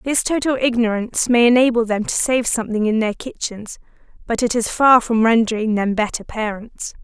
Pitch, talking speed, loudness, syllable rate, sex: 230 Hz, 180 wpm, -18 LUFS, 5.3 syllables/s, female